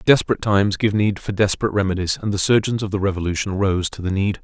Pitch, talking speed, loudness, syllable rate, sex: 100 Hz, 230 wpm, -20 LUFS, 7.0 syllables/s, male